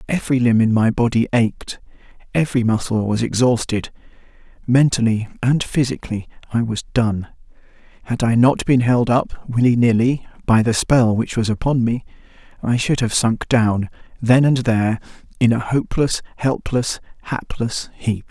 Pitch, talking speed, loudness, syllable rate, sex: 120 Hz, 150 wpm, -18 LUFS, 4.8 syllables/s, male